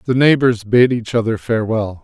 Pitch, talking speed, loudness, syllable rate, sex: 115 Hz, 175 wpm, -15 LUFS, 5.0 syllables/s, male